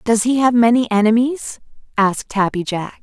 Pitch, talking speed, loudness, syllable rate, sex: 225 Hz, 160 wpm, -16 LUFS, 5.3 syllables/s, female